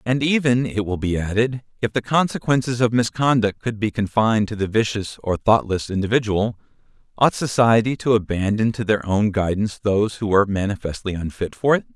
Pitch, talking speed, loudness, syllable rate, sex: 110 Hz, 175 wpm, -20 LUFS, 5.5 syllables/s, male